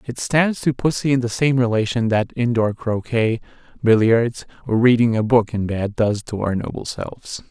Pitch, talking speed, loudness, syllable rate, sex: 115 Hz, 185 wpm, -19 LUFS, 4.8 syllables/s, male